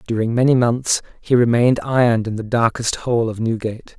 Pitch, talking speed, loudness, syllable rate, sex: 115 Hz, 180 wpm, -18 LUFS, 5.7 syllables/s, male